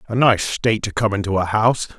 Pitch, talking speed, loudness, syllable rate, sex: 105 Hz, 240 wpm, -19 LUFS, 6.4 syllables/s, male